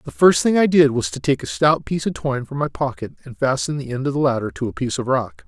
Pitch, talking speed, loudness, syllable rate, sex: 140 Hz, 305 wpm, -20 LUFS, 6.6 syllables/s, male